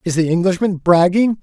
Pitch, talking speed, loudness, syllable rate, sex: 185 Hz, 170 wpm, -15 LUFS, 5.3 syllables/s, male